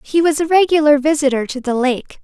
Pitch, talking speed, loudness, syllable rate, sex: 290 Hz, 215 wpm, -15 LUFS, 5.6 syllables/s, female